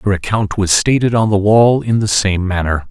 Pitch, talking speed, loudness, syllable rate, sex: 105 Hz, 225 wpm, -14 LUFS, 5.1 syllables/s, male